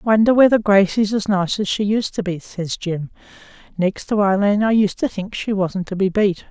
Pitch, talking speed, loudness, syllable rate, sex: 200 Hz, 220 wpm, -18 LUFS, 4.9 syllables/s, female